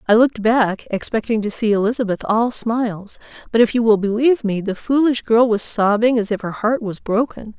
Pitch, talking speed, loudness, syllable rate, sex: 225 Hz, 205 wpm, -18 LUFS, 5.4 syllables/s, female